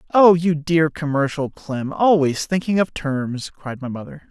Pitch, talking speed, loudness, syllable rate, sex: 155 Hz, 165 wpm, -20 LUFS, 4.2 syllables/s, male